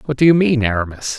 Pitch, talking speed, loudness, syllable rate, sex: 130 Hz, 255 wpm, -16 LUFS, 6.1 syllables/s, male